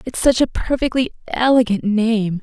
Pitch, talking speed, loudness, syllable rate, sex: 235 Hz, 150 wpm, -18 LUFS, 4.7 syllables/s, female